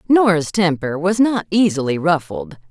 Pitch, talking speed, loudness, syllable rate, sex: 170 Hz, 135 wpm, -17 LUFS, 4.6 syllables/s, female